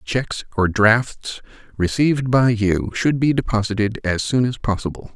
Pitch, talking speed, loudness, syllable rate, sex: 115 Hz, 150 wpm, -19 LUFS, 4.4 syllables/s, male